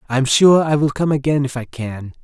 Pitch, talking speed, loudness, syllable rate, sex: 140 Hz, 240 wpm, -16 LUFS, 5.1 syllables/s, male